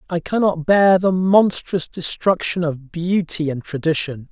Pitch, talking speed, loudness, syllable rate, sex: 170 Hz, 140 wpm, -18 LUFS, 4.1 syllables/s, male